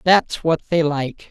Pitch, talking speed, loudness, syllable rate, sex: 155 Hz, 185 wpm, -19 LUFS, 3.6 syllables/s, female